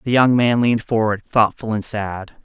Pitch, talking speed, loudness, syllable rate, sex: 110 Hz, 195 wpm, -18 LUFS, 4.9 syllables/s, female